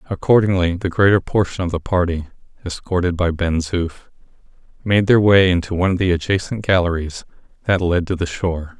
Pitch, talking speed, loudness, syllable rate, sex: 90 Hz, 170 wpm, -18 LUFS, 5.7 syllables/s, male